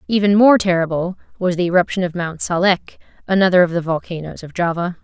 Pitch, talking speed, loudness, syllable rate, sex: 180 Hz, 180 wpm, -17 LUFS, 6.0 syllables/s, female